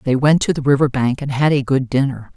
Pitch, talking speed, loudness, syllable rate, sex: 135 Hz, 280 wpm, -17 LUFS, 5.8 syllables/s, female